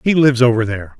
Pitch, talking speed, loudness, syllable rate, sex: 125 Hz, 240 wpm, -15 LUFS, 7.9 syllables/s, male